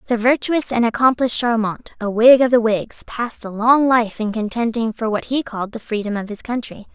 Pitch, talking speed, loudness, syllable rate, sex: 230 Hz, 215 wpm, -18 LUFS, 5.6 syllables/s, female